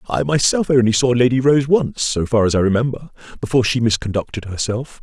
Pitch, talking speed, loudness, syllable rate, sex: 125 Hz, 190 wpm, -17 LUFS, 5.8 syllables/s, male